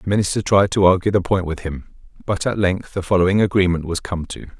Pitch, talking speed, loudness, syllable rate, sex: 95 Hz, 235 wpm, -19 LUFS, 6.0 syllables/s, male